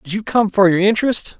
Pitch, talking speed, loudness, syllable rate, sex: 205 Hz, 260 wpm, -16 LUFS, 5.9 syllables/s, male